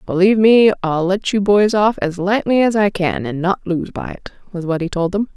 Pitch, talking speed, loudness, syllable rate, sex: 195 Hz, 245 wpm, -16 LUFS, 5.1 syllables/s, female